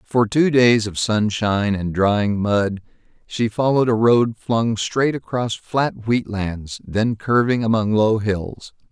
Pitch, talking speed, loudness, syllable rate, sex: 110 Hz, 150 wpm, -19 LUFS, 3.7 syllables/s, male